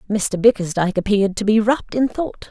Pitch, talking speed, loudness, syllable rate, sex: 210 Hz, 190 wpm, -18 LUFS, 6.0 syllables/s, female